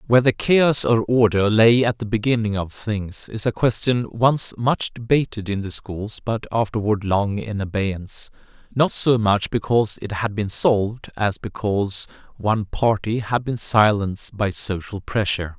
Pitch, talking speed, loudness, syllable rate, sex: 110 Hz, 160 wpm, -21 LUFS, 4.5 syllables/s, male